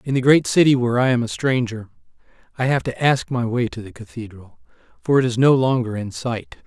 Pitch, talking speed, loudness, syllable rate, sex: 125 Hz, 225 wpm, -19 LUFS, 5.7 syllables/s, male